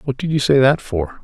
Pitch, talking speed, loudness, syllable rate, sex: 130 Hz, 290 wpm, -17 LUFS, 5.1 syllables/s, male